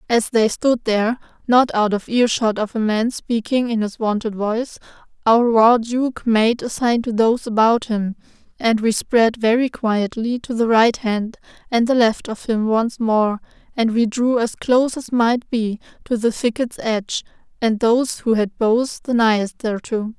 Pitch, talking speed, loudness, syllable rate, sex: 230 Hz, 185 wpm, -19 LUFS, 4.5 syllables/s, female